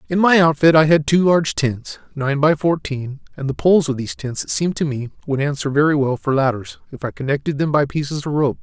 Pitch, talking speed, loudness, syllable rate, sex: 145 Hz, 245 wpm, -18 LUFS, 6.0 syllables/s, male